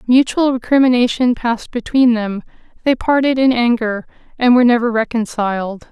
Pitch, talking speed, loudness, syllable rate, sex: 240 Hz, 130 wpm, -15 LUFS, 5.4 syllables/s, female